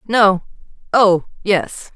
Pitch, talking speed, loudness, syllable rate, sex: 195 Hz, 90 wpm, -16 LUFS, 2.8 syllables/s, female